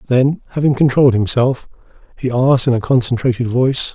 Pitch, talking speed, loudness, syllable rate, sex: 125 Hz, 150 wpm, -15 LUFS, 6.1 syllables/s, male